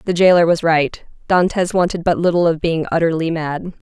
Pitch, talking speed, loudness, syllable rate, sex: 165 Hz, 185 wpm, -16 LUFS, 5.4 syllables/s, female